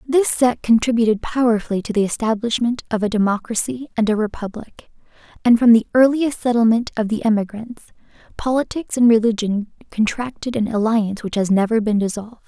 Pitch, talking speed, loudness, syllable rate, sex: 225 Hz, 155 wpm, -18 LUFS, 5.8 syllables/s, female